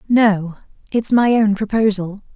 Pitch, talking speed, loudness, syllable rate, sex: 210 Hz, 130 wpm, -17 LUFS, 4.0 syllables/s, female